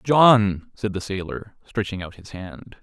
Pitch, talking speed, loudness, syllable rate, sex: 100 Hz, 170 wpm, -22 LUFS, 3.9 syllables/s, male